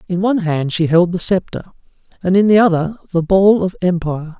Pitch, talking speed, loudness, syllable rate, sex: 180 Hz, 205 wpm, -15 LUFS, 5.7 syllables/s, male